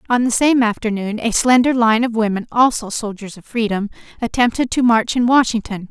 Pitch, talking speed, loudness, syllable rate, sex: 230 Hz, 175 wpm, -17 LUFS, 5.4 syllables/s, female